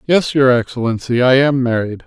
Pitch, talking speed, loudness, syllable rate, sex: 130 Hz, 175 wpm, -15 LUFS, 5.3 syllables/s, male